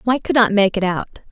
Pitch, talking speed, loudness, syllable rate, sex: 210 Hz, 275 wpm, -17 LUFS, 5.3 syllables/s, female